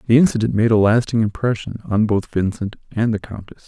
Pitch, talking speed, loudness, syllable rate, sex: 110 Hz, 195 wpm, -19 LUFS, 5.7 syllables/s, male